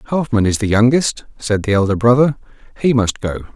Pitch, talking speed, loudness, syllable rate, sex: 115 Hz, 185 wpm, -16 LUFS, 5.7 syllables/s, male